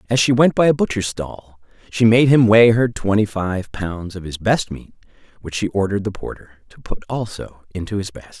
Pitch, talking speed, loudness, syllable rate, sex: 105 Hz, 215 wpm, -18 LUFS, 5.3 syllables/s, male